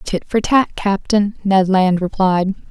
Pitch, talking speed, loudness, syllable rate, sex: 195 Hz, 155 wpm, -16 LUFS, 3.7 syllables/s, female